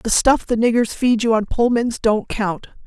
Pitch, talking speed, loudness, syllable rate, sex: 225 Hz, 210 wpm, -18 LUFS, 4.5 syllables/s, female